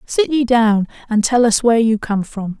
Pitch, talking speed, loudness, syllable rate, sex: 225 Hz, 230 wpm, -16 LUFS, 4.8 syllables/s, female